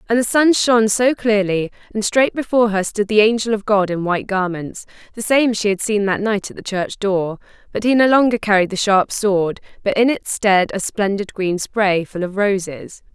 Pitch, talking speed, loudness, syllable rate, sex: 205 Hz, 220 wpm, -17 LUFS, 5.0 syllables/s, female